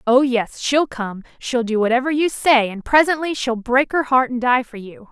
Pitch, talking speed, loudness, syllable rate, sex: 250 Hz, 225 wpm, -18 LUFS, 4.8 syllables/s, female